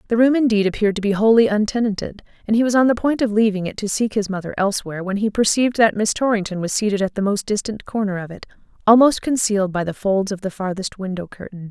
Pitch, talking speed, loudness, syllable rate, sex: 210 Hz, 240 wpm, -19 LUFS, 6.6 syllables/s, female